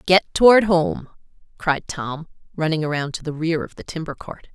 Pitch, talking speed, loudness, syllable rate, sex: 165 Hz, 185 wpm, -20 LUFS, 5.0 syllables/s, female